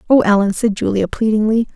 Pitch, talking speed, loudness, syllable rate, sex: 215 Hz, 170 wpm, -15 LUFS, 6.0 syllables/s, female